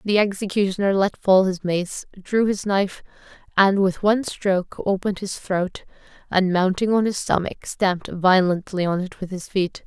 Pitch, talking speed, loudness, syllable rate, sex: 190 Hz, 170 wpm, -21 LUFS, 4.9 syllables/s, female